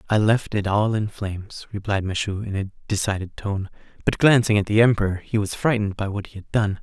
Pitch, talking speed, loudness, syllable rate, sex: 105 Hz, 220 wpm, -22 LUFS, 5.6 syllables/s, male